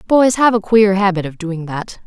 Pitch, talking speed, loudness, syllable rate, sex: 200 Hz, 230 wpm, -15 LUFS, 4.8 syllables/s, female